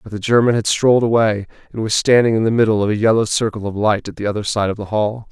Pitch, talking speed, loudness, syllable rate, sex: 110 Hz, 280 wpm, -17 LUFS, 6.6 syllables/s, male